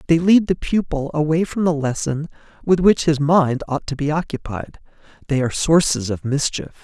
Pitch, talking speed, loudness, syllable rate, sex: 155 Hz, 185 wpm, -19 LUFS, 5.1 syllables/s, male